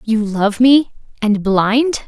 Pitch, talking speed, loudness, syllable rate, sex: 225 Hz, 145 wpm, -15 LUFS, 3.2 syllables/s, female